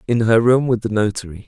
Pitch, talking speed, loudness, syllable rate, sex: 115 Hz, 245 wpm, -17 LUFS, 6.1 syllables/s, male